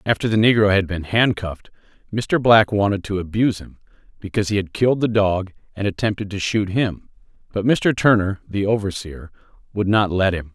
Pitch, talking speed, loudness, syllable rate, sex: 100 Hz, 180 wpm, -19 LUFS, 5.5 syllables/s, male